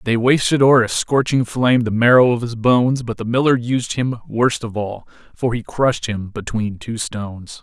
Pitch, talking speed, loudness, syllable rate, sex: 120 Hz, 205 wpm, -18 LUFS, 5.1 syllables/s, male